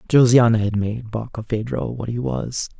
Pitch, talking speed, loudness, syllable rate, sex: 115 Hz, 150 wpm, -20 LUFS, 4.7 syllables/s, male